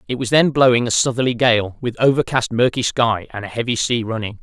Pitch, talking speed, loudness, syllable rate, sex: 120 Hz, 215 wpm, -18 LUFS, 5.8 syllables/s, male